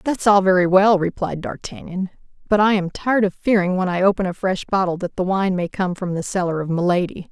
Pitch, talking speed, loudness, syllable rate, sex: 190 Hz, 230 wpm, -19 LUFS, 5.7 syllables/s, female